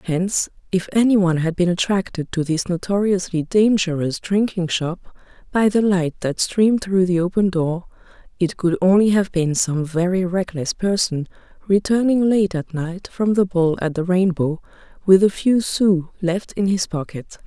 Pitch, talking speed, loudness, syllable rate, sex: 185 Hz, 170 wpm, -19 LUFS, 4.6 syllables/s, female